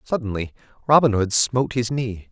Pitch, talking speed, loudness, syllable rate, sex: 115 Hz, 155 wpm, -20 LUFS, 5.3 syllables/s, male